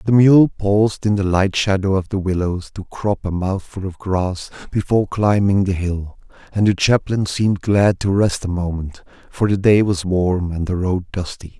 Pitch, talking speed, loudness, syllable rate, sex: 95 Hz, 195 wpm, -18 LUFS, 4.6 syllables/s, male